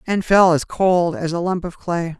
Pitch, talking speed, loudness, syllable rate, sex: 175 Hz, 245 wpm, -18 LUFS, 4.4 syllables/s, female